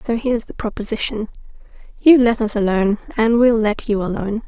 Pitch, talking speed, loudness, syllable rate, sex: 220 Hz, 175 wpm, -18 LUFS, 6.1 syllables/s, female